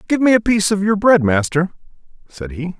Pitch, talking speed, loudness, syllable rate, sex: 185 Hz, 215 wpm, -16 LUFS, 5.8 syllables/s, male